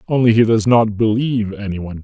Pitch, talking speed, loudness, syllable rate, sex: 110 Hz, 205 wpm, -16 LUFS, 6.4 syllables/s, male